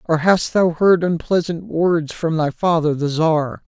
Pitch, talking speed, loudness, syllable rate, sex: 165 Hz, 175 wpm, -18 LUFS, 3.9 syllables/s, male